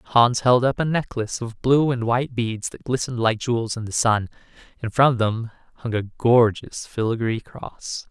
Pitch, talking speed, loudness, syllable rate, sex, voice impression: 120 Hz, 185 wpm, -22 LUFS, 4.7 syllables/s, male, very masculine, slightly young, adult-like, slightly thick, tensed, slightly weak, bright, soft, clear, very fluent, cool, very intellectual, very refreshing, sincere, slightly calm, very friendly, very reassuring, slightly unique, elegant, very sweet, very lively, kind, light